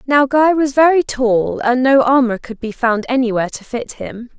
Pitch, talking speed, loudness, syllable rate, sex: 255 Hz, 205 wpm, -15 LUFS, 4.8 syllables/s, female